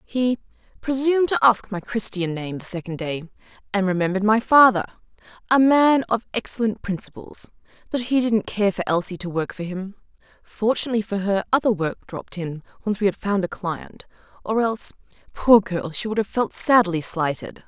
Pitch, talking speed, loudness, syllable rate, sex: 205 Hz, 175 wpm, -22 LUFS, 5.4 syllables/s, female